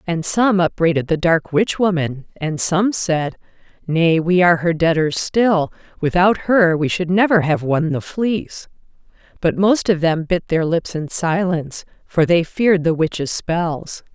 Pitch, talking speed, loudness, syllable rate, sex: 170 Hz, 170 wpm, -18 LUFS, 4.2 syllables/s, female